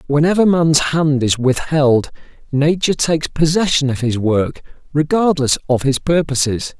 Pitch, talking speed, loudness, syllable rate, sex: 145 Hz, 135 wpm, -16 LUFS, 4.6 syllables/s, male